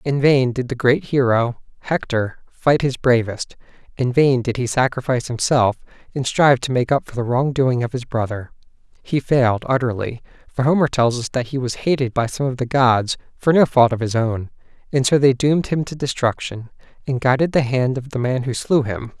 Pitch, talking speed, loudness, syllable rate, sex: 130 Hz, 210 wpm, -19 LUFS, 5.2 syllables/s, male